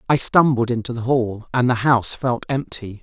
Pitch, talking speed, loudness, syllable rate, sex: 120 Hz, 200 wpm, -19 LUFS, 5.0 syllables/s, male